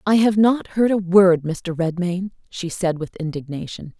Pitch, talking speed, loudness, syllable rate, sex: 180 Hz, 180 wpm, -20 LUFS, 4.4 syllables/s, female